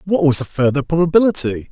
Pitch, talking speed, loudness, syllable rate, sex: 155 Hz, 175 wpm, -15 LUFS, 6.3 syllables/s, male